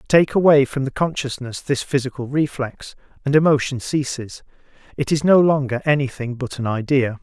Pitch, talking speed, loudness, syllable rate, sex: 135 Hz, 160 wpm, -20 LUFS, 5.2 syllables/s, male